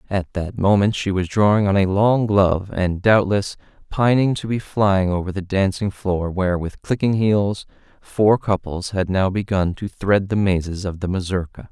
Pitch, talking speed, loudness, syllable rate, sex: 95 Hz, 185 wpm, -20 LUFS, 4.6 syllables/s, male